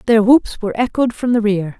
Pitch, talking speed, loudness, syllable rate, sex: 220 Hz, 235 wpm, -16 LUFS, 5.7 syllables/s, female